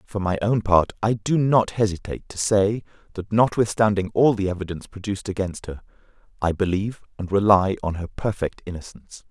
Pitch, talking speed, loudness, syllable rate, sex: 100 Hz, 170 wpm, -22 LUFS, 5.6 syllables/s, male